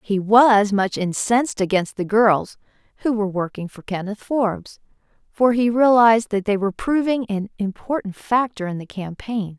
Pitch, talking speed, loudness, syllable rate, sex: 215 Hz, 165 wpm, -20 LUFS, 4.9 syllables/s, female